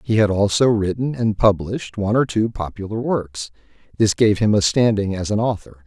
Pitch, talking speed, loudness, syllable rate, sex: 105 Hz, 195 wpm, -19 LUFS, 5.3 syllables/s, male